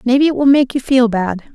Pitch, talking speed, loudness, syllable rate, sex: 250 Hz, 275 wpm, -14 LUFS, 5.9 syllables/s, female